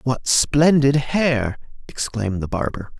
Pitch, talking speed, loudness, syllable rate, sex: 130 Hz, 120 wpm, -19 LUFS, 3.9 syllables/s, male